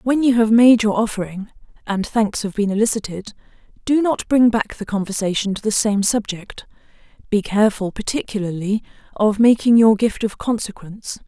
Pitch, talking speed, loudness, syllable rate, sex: 215 Hz, 160 wpm, -18 LUFS, 5.3 syllables/s, female